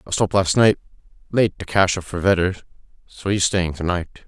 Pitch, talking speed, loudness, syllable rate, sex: 90 Hz, 210 wpm, -20 LUFS, 5.8 syllables/s, male